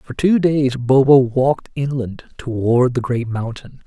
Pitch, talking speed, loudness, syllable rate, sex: 130 Hz, 155 wpm, -17 LUFS, 4.2 syllables/s, male